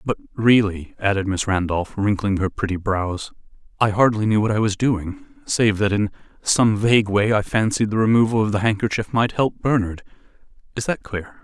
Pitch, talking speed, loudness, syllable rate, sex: 105 Hz, 185 wpm, -20 LUFS, 5.1 syllables/s, male